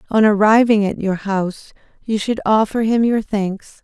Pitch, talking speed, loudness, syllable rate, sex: 210 Hz, 170 wpm, -17 LUFS, 4.6 syllables/s, female